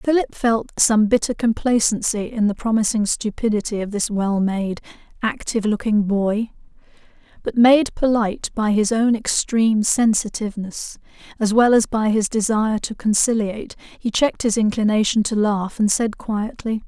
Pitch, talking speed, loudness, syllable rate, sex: 220 Hz, 145 wpm, -19 LUFS, 4.8 syllables/s, female